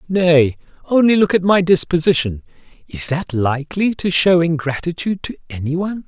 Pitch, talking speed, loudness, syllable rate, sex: 165 Hz, 140 wpm, -17 LUFS, 5.1 syllables/s, male